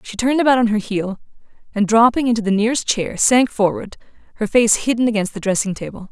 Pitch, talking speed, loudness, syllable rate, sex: 220 Hz, 205 wpm, -17 LUFS, 6.4 syllables/s, female